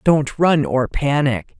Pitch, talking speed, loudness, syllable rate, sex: 150 Hz, 150 wpm, -18 LUFS, 3.4 syllables/s, female